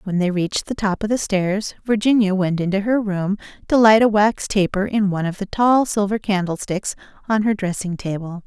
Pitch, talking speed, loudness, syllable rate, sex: 200 Hz, 205 wpm, -19 LUFS, 5.2 syllables/s, female